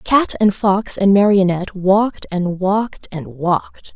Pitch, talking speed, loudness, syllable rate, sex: 195 Hz, 150 wpm, -16 LUFS, 4.2 syllables/s, female